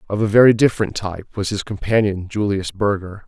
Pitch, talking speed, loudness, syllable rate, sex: 100 Hz, 185 wpm, -18 LUFS, 6.0 syllables/s, male